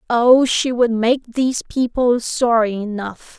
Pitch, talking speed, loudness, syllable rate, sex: 235 Hz, 140 wpm, -17 LUFS, 3.9 syllables/s, female